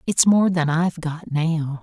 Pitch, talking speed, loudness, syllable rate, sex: 165 Hz, 195 wpm, -20 LUFS, 4.1 syllables/s, female